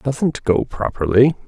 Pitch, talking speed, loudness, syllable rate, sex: 125 Hz, 120 wpm, -18 LUFS, 3.8 syllables/s, male